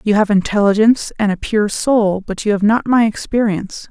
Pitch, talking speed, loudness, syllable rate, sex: 210 Hz, 200 wpm, -15 LUFS, 5.4 syllables/s, female